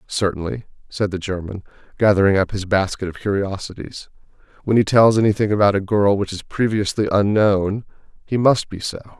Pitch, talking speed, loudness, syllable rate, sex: 100 Hz, 165 wpm, -19 LUFS, 5.5 syllables/s, male